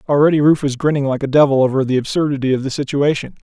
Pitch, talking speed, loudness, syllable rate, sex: 140 Hz, 225 wpm, -16 LUFS, 7.5 syllables/s, male